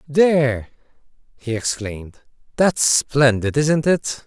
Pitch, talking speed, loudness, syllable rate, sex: 130 Hz, 100 wpm, -18 LUFS, 3.6 syllables/s, male